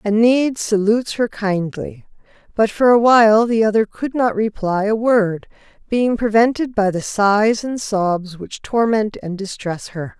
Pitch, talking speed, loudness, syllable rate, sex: 215 Hz, 160 wpm, -17 LUFS, 4.2 syllables/s, female